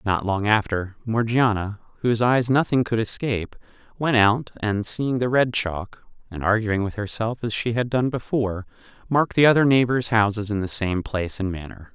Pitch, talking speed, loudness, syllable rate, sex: 110 Hz, 180 wpm, -22 LUFS, 5.1 syllables/s, male